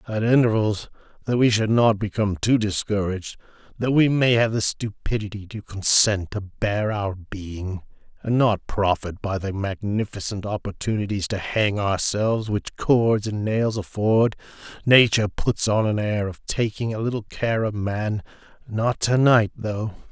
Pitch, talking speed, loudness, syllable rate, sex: 105 Hz, 150 wpm, -22 LUFS, 4.5 syllables/s, male